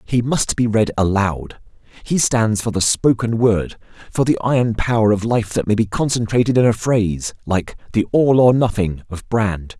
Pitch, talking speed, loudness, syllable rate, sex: 110 Hz, 190 wpm, -17 LUFS, 4.7 syllables/s, male